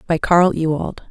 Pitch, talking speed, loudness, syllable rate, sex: 165 Hz, 165 wpm, -17 LUFS, 4.4 syllables/s, female